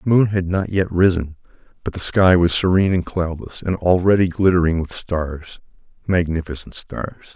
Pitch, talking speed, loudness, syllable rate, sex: 90 Hz, 155 wpm, -19 LUFS, 4.9 syllables/s, male